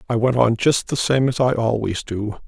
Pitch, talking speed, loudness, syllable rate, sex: 120 Hz, 245 wpm, -19 LUFS, 5.0 syllables/s, male